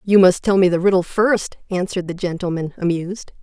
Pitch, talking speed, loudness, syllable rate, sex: 185 Hz, 195 wpm, -18 LUFS, 5.8 syllables/s, female